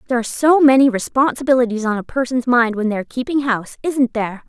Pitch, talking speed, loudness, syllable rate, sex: 245 Hz, 200 wpm, -17 LUFS, 6.7 syllables/s, female